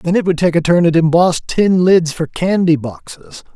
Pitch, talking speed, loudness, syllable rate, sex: 170 Hz, 220 wpm, -13 LUFS, 5.0 syllables/s, male